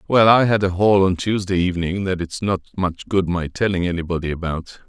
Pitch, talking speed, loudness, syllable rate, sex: 90 Hz, 210 wpm, -19 LUFS, 5.6 syllables/s, male